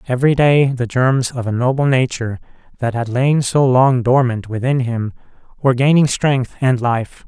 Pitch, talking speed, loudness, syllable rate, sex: 125 Hz, 175 wpm, -16 LUFS, 4.9 syllables/s, male